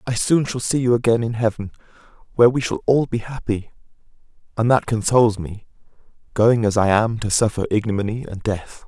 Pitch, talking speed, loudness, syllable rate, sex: 115 Hz, 185 wpm, -19 LUFS, 5.7 syllables/s, male